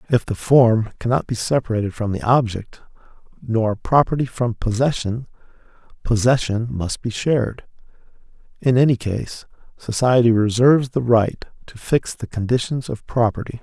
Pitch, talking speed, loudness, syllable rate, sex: 120 Hz, 130 wpm, -19 LUFS, 4.8 syllables/s, male